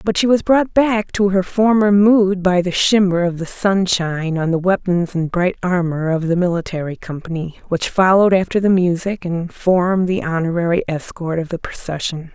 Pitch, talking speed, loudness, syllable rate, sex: 185 Hz, 185 wpm, -17 LUFS, 5.0 syllables/s, female